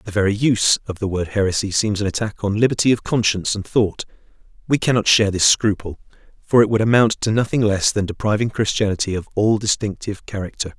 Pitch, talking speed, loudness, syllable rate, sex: 105 Hz, 195 wpm, -19 LUFS, 6.4 syllables/s, male